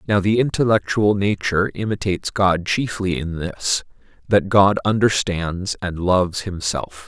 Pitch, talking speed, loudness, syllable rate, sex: 95 Hz, 125 wpm, -20 LUFS, 4.4 syllables/s, male